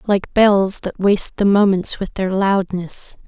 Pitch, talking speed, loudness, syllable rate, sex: 195 Hz, 165 wpm, -17 LUFS, 3.9 syllables/s, female